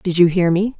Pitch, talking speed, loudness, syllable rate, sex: 180 Hz, 300 wpm, -16 LUFS, 5.3 syllables/s, female